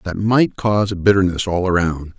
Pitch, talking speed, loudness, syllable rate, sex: 95 Hz, 190 wpm, -17 LUFS, 5.4 syllables/s, male